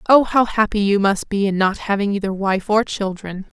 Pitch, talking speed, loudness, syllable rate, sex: 200 Hz, 215 wpm, -18 LUFS, 5.2 syllables/s, female